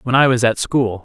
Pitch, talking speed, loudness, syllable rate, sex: 120 Hz, 290 wpm, -16 LUFS, 5.4 syllables/s, male